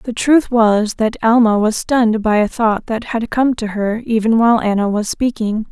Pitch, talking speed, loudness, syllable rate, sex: 225 Hz, 210 wpm, -15 LUFS, 4.7 syllables/s, female